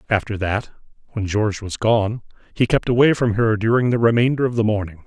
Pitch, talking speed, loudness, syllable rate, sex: 110 Hz, 200 wpm, -19 LUFS, 5.8 syllables/s, male